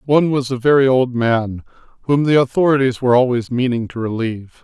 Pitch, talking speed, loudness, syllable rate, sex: 125 Hz, 180 wpm, -16 LUFS, 5.8 syllables/s, male